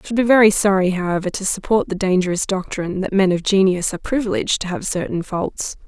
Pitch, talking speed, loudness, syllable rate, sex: 195 Hz, 215 wpm, -18 LUFS, 6.3 syllables/s, female